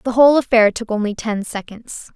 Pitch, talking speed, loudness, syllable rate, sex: 225 Hz, 195 wpm, -16 LUFS, 5.5 syllables/s, female